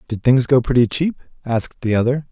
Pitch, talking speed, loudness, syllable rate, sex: 125 Hz, 205 wpm, -18 LUFS, 5.8 syllables/s, male